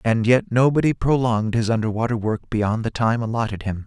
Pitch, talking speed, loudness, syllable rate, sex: 115 Hz, 185 wpm, -21 LUFS, 5.7 syllables/s, male